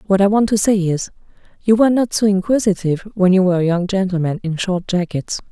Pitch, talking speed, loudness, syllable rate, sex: 195 Hz, 220 wpm, -17 LUFS, 6.1 syllables/s, female